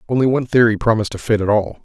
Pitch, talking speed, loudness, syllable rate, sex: 115 Hz, 260 wpm, -17 LUFS, 7.9 syllables/s, male